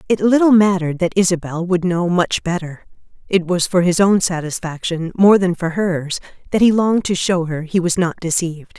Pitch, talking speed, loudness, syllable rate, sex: 180 Hz, 200 wpm, -17 LUFS, 5.3 syllables/s, female